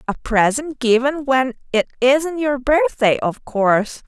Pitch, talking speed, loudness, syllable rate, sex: 260 Hz, 145 wpm, -18 LUFS, 4.0 syllables/s, female